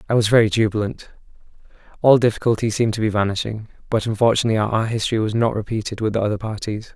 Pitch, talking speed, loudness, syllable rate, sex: 110 Hz, 180 wpm, -20 LUFS, 7.2 syllables/s, male